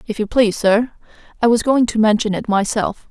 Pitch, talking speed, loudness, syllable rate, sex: 220 Hz, 215 wpm, -17 LUFS, 5.5 syllables/s, female